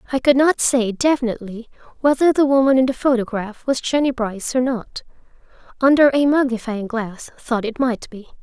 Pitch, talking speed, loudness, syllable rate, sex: 250 Hz, 170 wpm, -18 LUFS, 5.4 syllables/s, female